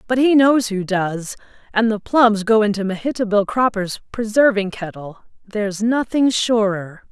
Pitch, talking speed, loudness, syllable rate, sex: 215 Hz, 135 wpm, -18 LUFS, 4.5 syllables/s, female